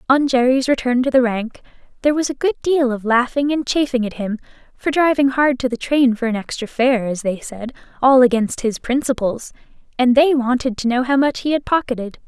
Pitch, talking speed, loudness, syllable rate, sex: 255 Hz, 215 wpm, -18 LUFS, 5.5 syllables/s, female